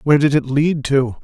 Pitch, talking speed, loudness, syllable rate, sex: 140 Hz, 245 wpm, -16 LUFS, 5.5 syllables/s, male